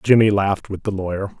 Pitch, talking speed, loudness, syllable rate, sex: 100 Hz, 215 wpm, -19 LUFS, 6.0 syllables/s, male